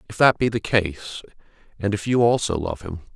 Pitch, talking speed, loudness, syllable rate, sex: 100 Hz, 210 wpm, -21 LUFS, 5.9 syllables/s, male